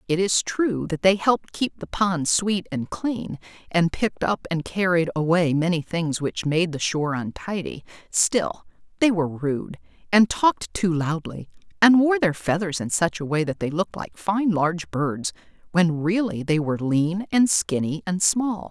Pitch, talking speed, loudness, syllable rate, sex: 170 Hz, 185 wpm, -23 LUFS, 4.5 syllables/s, female